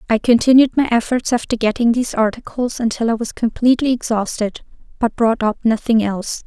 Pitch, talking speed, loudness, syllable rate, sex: 230 Hz, 165 wpm, -17 LUFS, 5.9 syllables/s, female